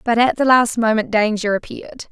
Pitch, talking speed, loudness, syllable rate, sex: 230 Hz, 200 wpm, -17 LUFS, 5.5 syllables/s, female